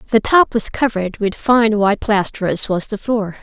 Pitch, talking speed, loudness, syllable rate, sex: 215 Hz, 210 wpm, -16 LUFS, 5.1 syllables/s, female